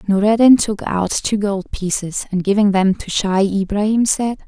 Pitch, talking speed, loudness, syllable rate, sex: 200 Hz, 175 wpm, -17 LUFS, 4.6 syllables/s, female